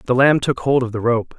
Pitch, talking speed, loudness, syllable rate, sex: 125 Hz, 305 wpm, -17 LUFS, 5.2 syllables/s, male